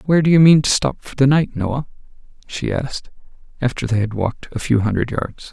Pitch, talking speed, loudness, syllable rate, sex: 130 Hz, 215 wpm, -18 LUFS, 5.9 syllables/s, male